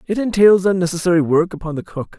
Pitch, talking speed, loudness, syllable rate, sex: 180 Hz, 190 wpm, -16 LUFS, 6.3 syllables/s, male